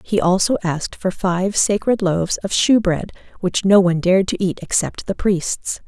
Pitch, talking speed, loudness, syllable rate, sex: 190 Hz, 185 wpm, -18 LUFS, 4.9 syllables/s, female